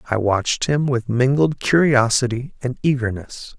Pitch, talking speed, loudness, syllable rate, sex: 125 Hz, 135 wpm, -19 LUFS, 4.6 syllables/s, male